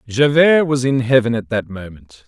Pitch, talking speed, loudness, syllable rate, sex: 120 Hz, 185 wpm, -15 LUFS, 4.7 syllables/s, male